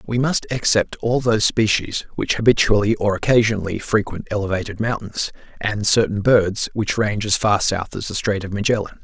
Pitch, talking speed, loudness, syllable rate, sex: 105 Hz, 175 wpm, -19 LUFS, 5.4 syllables/s, male